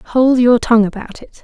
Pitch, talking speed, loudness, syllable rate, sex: 235 Hz, 210 wpm, -13 LUFS, 5.0 syllables/s, female